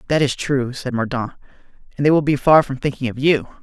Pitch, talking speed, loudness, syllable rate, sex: 135 Hz, 230 wpm, -18 LUFS, 5.9 syllables/s, male